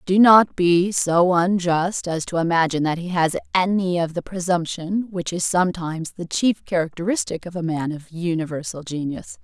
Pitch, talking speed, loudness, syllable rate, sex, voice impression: 175 Hz, 170 wpm, -21 LUFS, 4.9 syllables/s, female, very feminine, slightly middle-aged, very thin, tensed, powerful, slightly bright, slightly soft, clear, fluent, raspy, cool, slightly intellectual, refreshing, slightly sincere, slightly calm, slightly friendly, slightly reassuring, very unique, slightly elegant, wild, very lively, very strict, intense, very sharp, light